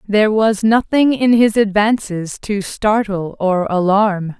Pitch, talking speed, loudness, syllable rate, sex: 210 Hz, 135 wpm, -15 LUFS, 3.8 syllables/s, female